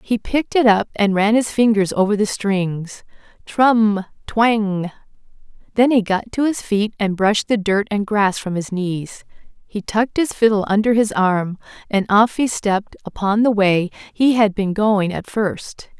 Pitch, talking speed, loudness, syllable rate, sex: 210 Hz, 175 wpm, -18 LUFS, 4.4 syllables/s, female